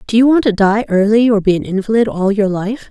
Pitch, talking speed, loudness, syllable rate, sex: 210 Hz, 270 wpm, -13 LUFS, 5.8 syllables/s, female